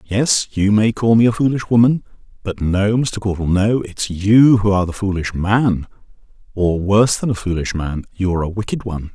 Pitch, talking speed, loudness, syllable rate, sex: 100 Hz, 195 wpm, -17 LUFS, 5.2 syllables/s, male